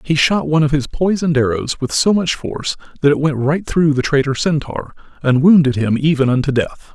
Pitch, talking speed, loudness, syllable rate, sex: 145 Hz, 215 wpm, -16 LUFS, 5.6 syllables/s, male